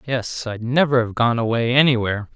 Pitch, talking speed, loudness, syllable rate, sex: 120 Hz, 180 wpm, -19 LUFS, 5.4 syllables/s, male